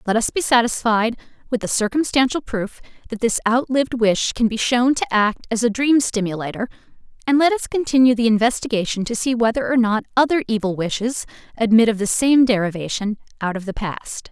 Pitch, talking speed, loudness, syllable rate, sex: 230 Hz, 185 wpm, -19 LUFS, 5.6 syllables/s, female